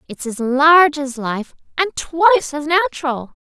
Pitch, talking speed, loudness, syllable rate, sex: 295 Hz, 155 wpm, -16 LUFS, 4.4 syllables/s, female